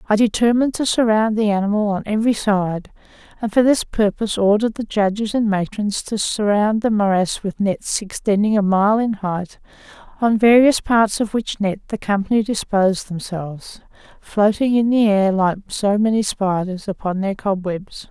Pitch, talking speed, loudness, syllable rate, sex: 205 Hz, 165 wpm, -18 LUFS, 4.9 syllables/s, female